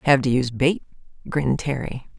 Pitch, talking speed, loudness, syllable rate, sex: 135 Hz, 165 wpm, -23 LUFS, 5.9 syllables/s, female